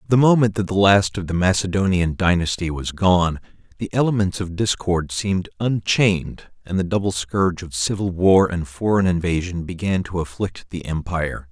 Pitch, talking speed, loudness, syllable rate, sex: 95 Hz, 165 wpm, -20 LUFS, 5.1 syllables/s, male